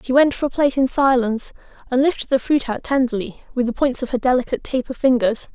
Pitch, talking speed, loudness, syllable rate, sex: 260 Hz, 225 wpm, -19 LUFS, 6.4 syllables/s, female